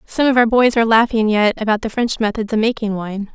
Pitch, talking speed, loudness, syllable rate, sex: 220 Hz, 250 wpm, -16 LUFS, 5.9 syllables/s, female